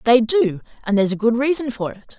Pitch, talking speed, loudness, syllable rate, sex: 235 Hz, 220 wpm, -19 LUFS, 6.0 syllables/s, female